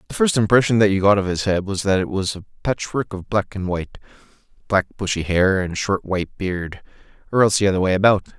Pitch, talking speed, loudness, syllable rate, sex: 100 Hz, 220 wpm, -20 LUFS, 6.2 syllables/s, male